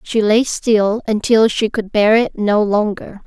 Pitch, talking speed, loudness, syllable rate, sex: 215 Hz, 185 wpm, -15 LUFS, 3.9 syllables/s, female